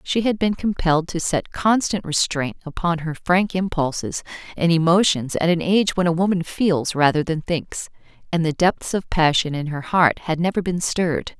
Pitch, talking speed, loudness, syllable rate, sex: 170 Hz, 190 wpm, -20 LUFS, 4.9 syllables/s, female